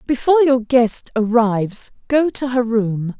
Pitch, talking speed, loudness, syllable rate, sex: 240 Hz, 150 wpm, -17 LUFS, 4.2 syllables/s, female